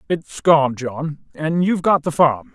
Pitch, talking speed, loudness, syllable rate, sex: 150 Hz, 190 wpm, -18 LUFS, 4.1 syllables/s, male